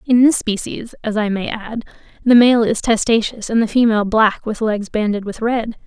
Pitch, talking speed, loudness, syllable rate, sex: 220 Hz, 205 wpm, -17 LUFS, 5.0 syllables/s, female